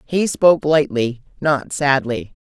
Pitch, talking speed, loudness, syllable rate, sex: 145 Hz, 125 wpm, -18 LUFS, 4.0 syllables/s, female